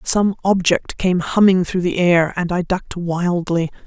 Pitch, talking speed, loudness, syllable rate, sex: 180 Hz, 170 wpm, -18 LUFS, 4.3 syllables/s, female